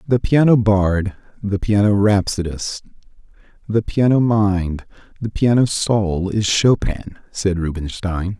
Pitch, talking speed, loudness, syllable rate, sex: 100 Hz, 115 wpm, -18 LUFS, 3.8 syllables/s, male